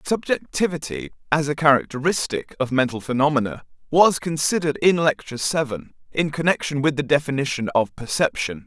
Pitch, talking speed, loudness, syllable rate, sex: 145 Hz, 130 wpm, -21 LUFS, 5.6 syllables/s, male